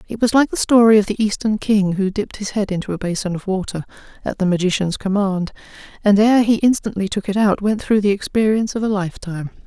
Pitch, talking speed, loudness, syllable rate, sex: 200 Hz, 225 wpm, -18 LUFS, 6.3 syllables/s, female